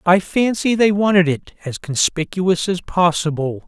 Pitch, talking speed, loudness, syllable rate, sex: 180 Hz, 145 wpm, -17 LUFS, 4.4 syllables/s, male